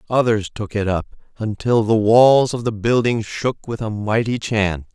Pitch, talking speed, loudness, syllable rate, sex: 110 Hz, 180 wpm, -18 LUFS, 4.4 syllables/s, male